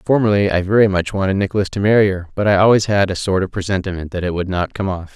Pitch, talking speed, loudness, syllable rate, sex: 95 Hz, 270 wpm, -17 LUFS, 6.8 syllables/s, male